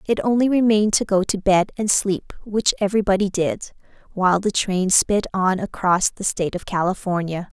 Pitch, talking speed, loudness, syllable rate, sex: 195 Hz, 165 wpm, -20 LUFS, 5.2 syllables/s, female